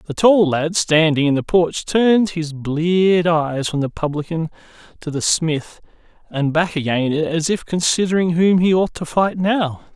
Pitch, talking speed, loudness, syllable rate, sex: 165 Hz, 175 wpm, -18 LUFS, 4.3 syllables/s, male